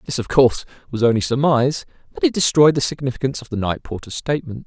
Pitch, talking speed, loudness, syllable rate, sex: 135 Hz, 205 wpm, -19 LUFS, 7.0 syllables/s, male